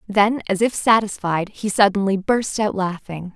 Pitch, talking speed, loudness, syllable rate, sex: 200 Hz, 160 wpm, -19 LUFS, 4.5 syllables/s, female